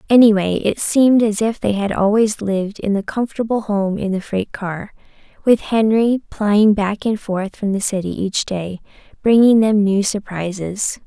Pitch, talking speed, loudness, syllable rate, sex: 205 Hz, 175 wpm, -17 LUFS, 4.6 syllables/s, female